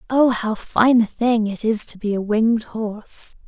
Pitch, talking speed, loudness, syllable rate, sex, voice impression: 220 Hz, 205 wpm, -20 LUFS, 4.4 syllables/s, female, very feminine, young, very thin, slightly tensed, weak, bright, soft, clear, slightly muffled, fluent, very cute, intellectual, refreshing, slightly sincere, very calm, very friendly, very reassuring, very unique, elegant, very sweet, slightly lively, very kind, modest